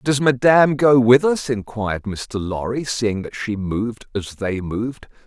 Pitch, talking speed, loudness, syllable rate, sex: 115 Hz, 170 wpm, -19 LUFS, 4.4 syllables/s, male